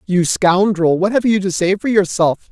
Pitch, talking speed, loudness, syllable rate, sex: 190 Hz, 215 wpm, -15 LUFS, 4.6 syllables/s, male